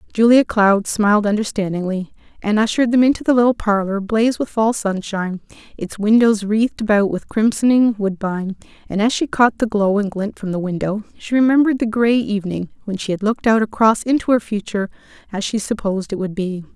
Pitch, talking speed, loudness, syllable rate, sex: 210 Hz, 190 wpm, -18 LUFS, 6.0 syllables/s, female